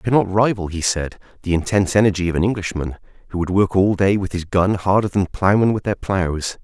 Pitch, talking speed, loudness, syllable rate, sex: 95 Hz, 235 wpm, -19 LUFS, 5.9 syllables/s, male